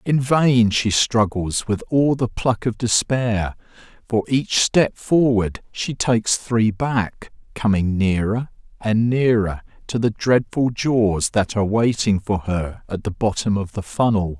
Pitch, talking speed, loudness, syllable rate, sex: 110 Hz, 155 wpm, -20 LUFS, 3.8 syllables/s, male